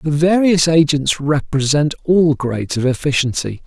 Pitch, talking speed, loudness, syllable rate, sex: 150 Hz, 130 wpm, -16 LUFS, 4.6 syllables/s, male